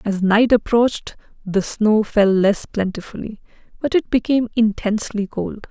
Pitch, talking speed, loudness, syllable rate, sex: 215 Hz, 135 wpm, -18 LUFS, 4.7 syllables/s, female